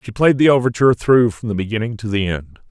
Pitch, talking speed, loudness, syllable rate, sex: 115 Hz, 245 wpm, -16 LUFS, 6.4 syllables/s, male